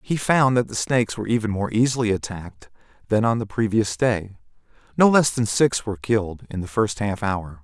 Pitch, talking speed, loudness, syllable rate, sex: 110 Hz, 205 wpm, -21 LUFS, 5.5 syllables/s, male